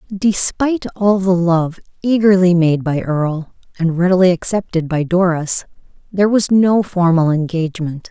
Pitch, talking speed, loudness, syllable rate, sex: 180 Hz, 135 wpm, -15 LUFS, 4.8 syllables/s, female